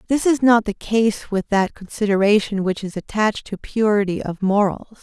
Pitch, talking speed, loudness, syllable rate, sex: 205 Hz, 180 wpm, -19 LUFS, 5.0 syllables/s, female